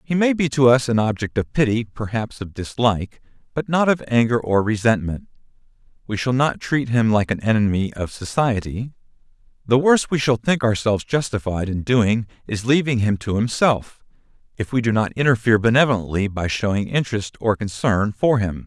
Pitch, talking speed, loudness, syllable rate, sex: 115 Hz, 175 wpm, -20 LUFS, 5.3 syllables/s, male